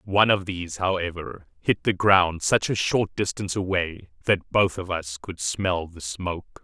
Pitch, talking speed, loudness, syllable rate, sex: 90 Hz, 180 wpm, -24 LUFS, 4.6 syllables/s, male